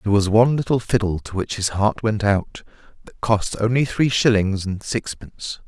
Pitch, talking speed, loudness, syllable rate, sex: 105 Hz, 190 wpm, -20 LUFS, 5.1 syllables/s, male